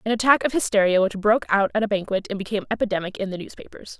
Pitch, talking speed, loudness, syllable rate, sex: 205 Hz, 240 wpm, -22 LUFS, 7.4 syllables/s, female